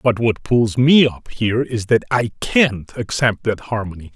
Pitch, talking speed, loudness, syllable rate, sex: 115 Hz, 190 wpm, -18 LUFS, 4.5 syllables/s, male